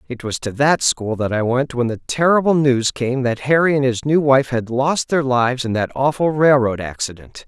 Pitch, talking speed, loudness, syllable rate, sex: 130 Hz, 225 wpm, -18 LUFS, 5.0 syllables/s, male